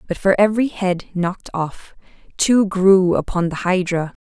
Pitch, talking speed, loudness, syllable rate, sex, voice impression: 185 Hz, 155 wpm, -18 LUFS, 4.6 syllables/s, female, feminine, adult-like, slightly intellectual, slightly calm, friendly, slightly sweet